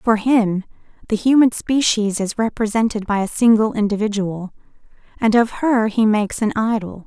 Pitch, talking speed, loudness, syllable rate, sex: 220 Hz, 155 wpm, -18 LUFS, 4.9 syllables/s, female